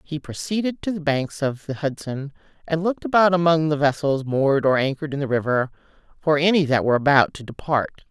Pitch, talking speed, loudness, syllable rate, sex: 150 Hz, 200 wpm, -21 LUFS, 6.0 syllables/s, female